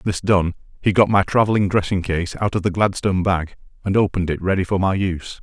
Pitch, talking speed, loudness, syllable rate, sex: 95 Hz, 220 wpm, -19 LUFS, 6.2 syllables/s, male